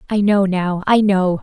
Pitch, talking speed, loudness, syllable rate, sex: 195 Hz, 210 wpm, -16 LUFS, 4.2 syllables/s, female